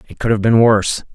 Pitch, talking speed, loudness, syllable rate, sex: 110 Hz, 265 wpm, -14 LUFS, 6.5 syllables/s, male